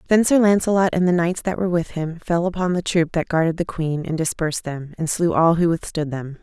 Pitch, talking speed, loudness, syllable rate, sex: 170 Hz, 250 wpm, -20 LUFS, 5.7 syllables/s, female